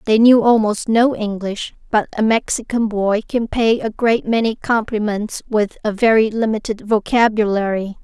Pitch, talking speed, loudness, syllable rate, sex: 220 Hz, 150 wpm, -17 LUFS, 4.6 syllables/s, female